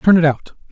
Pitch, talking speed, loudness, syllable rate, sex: 165 Hz, 250 wpm, -15 LUFS, 7.7 syllables/s, male